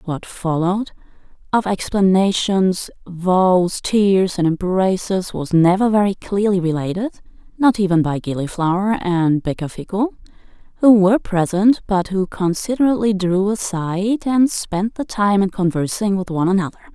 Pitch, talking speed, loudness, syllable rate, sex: 190 Hz, 120 wpm, -18 LUFS, 4.8 syllables/s, female